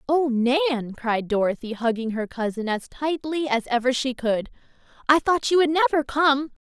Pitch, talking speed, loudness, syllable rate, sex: 260 Hz, 170 wpm, -23 LUFS, 4.7 syllables/s, female